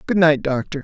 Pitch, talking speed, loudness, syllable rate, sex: 150 Hz, 215 wpm, -18 LUFS, 5.8 syllables/s, male